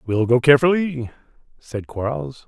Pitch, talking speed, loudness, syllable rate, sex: 130 Hz, 120 wpm, -19 LUFS, 4.9 syllables/s, male